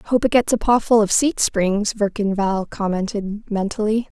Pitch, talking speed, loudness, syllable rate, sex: 210 Hz, 185 wpm, -19 LUFS, 4.4 syllables/s, female